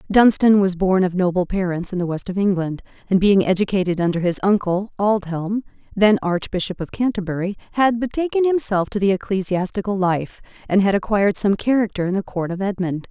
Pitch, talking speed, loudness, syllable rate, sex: 195 Hz, 180 wpm, -20 LUFS, 5.6 syllables/s, female